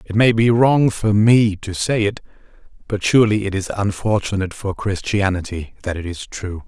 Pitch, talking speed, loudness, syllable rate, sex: 100 Hz, 180 wpm, -18 LUFS, 5.0 syllables/s, male